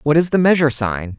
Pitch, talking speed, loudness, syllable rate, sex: 140 Hz, 255 wpm, -16 LUFS, 6.1 syllables/s, male